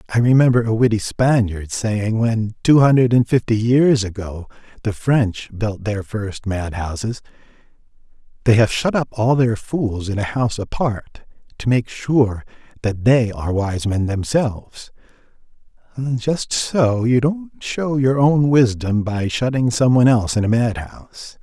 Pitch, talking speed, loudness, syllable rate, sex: 115 Hz, 155 wpm, -18 LUFS, 4.2 syllables/s, male